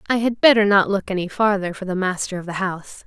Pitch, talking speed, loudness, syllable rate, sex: 195 Hz, 255 wpm, -19 LUFS, 6.2 syllables/s, female